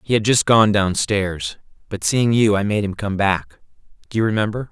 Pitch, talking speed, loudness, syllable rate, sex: 105 Hz, 215 wpm, -18 LUFS, 5.0 syllables/s, male